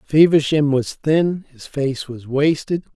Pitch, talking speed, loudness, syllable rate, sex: 145 Hz, 140 wpm, -18 LUFS, 3.8 syllables/s, male